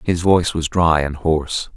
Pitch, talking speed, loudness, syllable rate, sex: 80 Hz, 205 wpm, -18 LUFS, 4.9 syllables/s, male